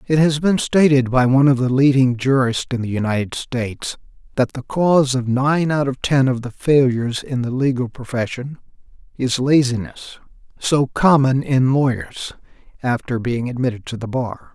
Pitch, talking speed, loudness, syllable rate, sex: 130 Hz, 170 wpm, -18 LUFS, 4.9 syllables/s, male